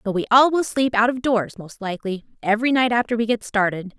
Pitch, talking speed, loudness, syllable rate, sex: 225 Hz, 240 wpm, -20 LUFS, 6.2 syllables/s, female